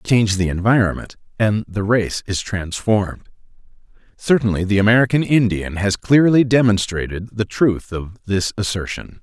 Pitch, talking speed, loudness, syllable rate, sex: 105 Hz, 130 wpm, -18 LUFS, 4.8 syllables/s, male